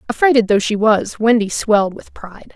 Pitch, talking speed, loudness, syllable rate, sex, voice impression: 220 Hz, 190 wpm, -15 LUFS, 5.5 syllables/s, female, feminine, slightly young, tensed, powerful, clear, raspy, intellectual, calm, lively, slightly sharp